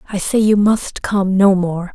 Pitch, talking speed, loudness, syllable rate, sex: 195 Hz, 215 wpm, -15 LUFS, 4.0 syllables/s, female